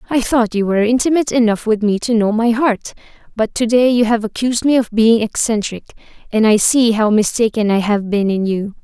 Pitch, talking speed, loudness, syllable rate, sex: 225 Hz, 215 wpm, -15 LUFS, 5.6 syllables/s, female